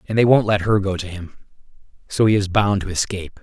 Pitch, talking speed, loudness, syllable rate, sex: 100 Hz, 245 wpm, -19 LUFS, 6.2 syllables/s, male